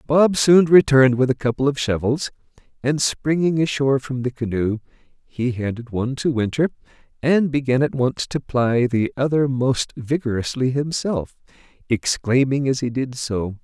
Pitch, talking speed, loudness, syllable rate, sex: 130 Hz, 155 wpm, -20 LUFS, 4.6 syllables/s, male